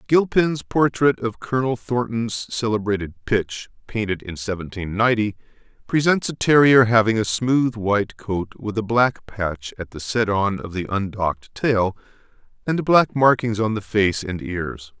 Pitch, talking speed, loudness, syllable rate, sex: 110 Hz, 155 wpm, -21 LUFS, 4.5 syllables/s, male